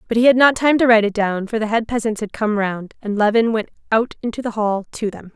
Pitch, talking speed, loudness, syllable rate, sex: 220 Hz, 280 wpm, -18 LUFS, 6.1 syllables/s, female